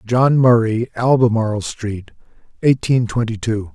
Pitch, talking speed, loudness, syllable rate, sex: 115 Hz, 110 wpm, -17 LUFS, 4.3 syllables/s, male